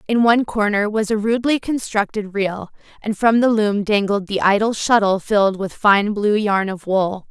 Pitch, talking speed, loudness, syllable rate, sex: 210 Hz, 190 wpm, -18 LUFS, 4.8 syllables/s, female